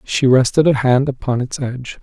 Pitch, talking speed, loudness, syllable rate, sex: 130 Hz, 210 wpm, -16 LUFS, 5.2 syllables/s, male